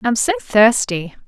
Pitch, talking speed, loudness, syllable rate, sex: 220 Hz, 190 wpm, -16 LUFS, 5.0 syllables/s, female